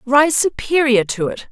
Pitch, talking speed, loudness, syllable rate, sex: 265 Hz, 160 wpm, -16 LUFS, 4.3 syllables/s, female